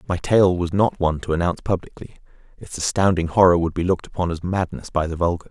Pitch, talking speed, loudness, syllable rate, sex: 90 Hz, 220 wpm, -20 LUFS, 6.5 syllables/s, male